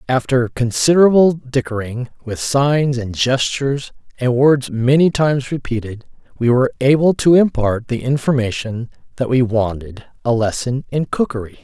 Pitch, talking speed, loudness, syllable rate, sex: 130 Hz, 135 wpm, -17 LUFS, 4.8 syllables/s, male